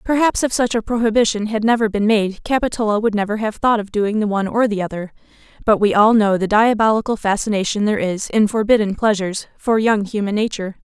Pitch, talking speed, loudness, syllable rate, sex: 215 Hz, 205 wpm, -17 LUFS, 6.1 syllables/s, female